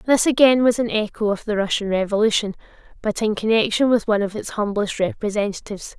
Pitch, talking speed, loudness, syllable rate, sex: 215 Hz, 180 wpm, -20 LUFS, 6.1 syllables/s, female